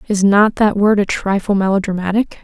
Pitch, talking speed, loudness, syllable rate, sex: 200 Hz, 175 wpm, -15 LUFS, 5.4 syllables/s, female